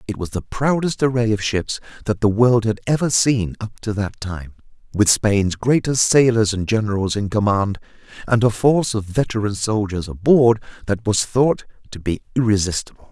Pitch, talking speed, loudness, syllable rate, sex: 110 Hz, 175 wpm, -19 LUFS, 5.0 syllables/s, male